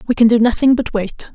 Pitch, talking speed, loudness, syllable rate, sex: 230 Hz, 265 wpm, -14 LUFS, 5.9 syllables/s, female